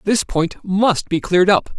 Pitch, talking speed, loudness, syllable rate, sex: 190 Hz, 200 wpm, -17 LUFS, 4.4 syllables/s, male